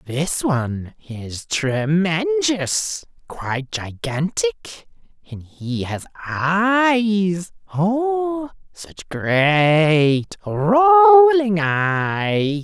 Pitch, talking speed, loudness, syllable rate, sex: 185 Hz, 70 wpm, -18 LUFS, 2.1 syllables/s, male